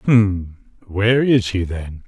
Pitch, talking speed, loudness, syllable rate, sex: 100 Hz, 145 wpm, -18 LUFS, 3.2 syllables/s, male